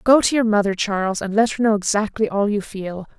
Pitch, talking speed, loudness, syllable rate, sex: 210 Hz, 245 wpm, -20 LUFS, 5.7 syllables/s, female